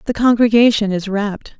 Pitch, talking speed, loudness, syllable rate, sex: 215 Hz, 150 wpm, -15 LUFS, 4.9 syllables/s, female